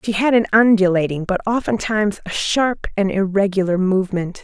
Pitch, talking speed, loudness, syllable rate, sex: 200 Hz, 150 wpm, -18 LUFS, 5.5 syllables/s, female